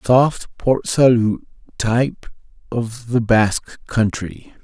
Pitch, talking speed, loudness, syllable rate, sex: 115 Hz, 105 wpm, -18 LUFS, 3.1 syllables/s, male